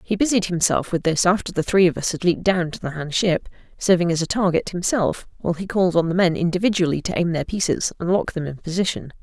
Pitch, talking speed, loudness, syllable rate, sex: 180 Hz, 240 wpm, -21 LUFS, 6.2 syllables/s, female